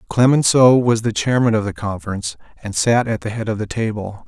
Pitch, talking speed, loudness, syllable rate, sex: 115 Hz, 210 wpm, -17 LUFS, 5.8 syllables/s, male